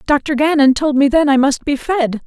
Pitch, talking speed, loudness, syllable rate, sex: 280 Hz, 240 wpm, -14 LUFS, 4.8 syllables/s, female